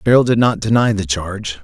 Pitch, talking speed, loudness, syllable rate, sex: 105 Hz, 220 wpm, -16 LUFS, 5.8 syllables/s, male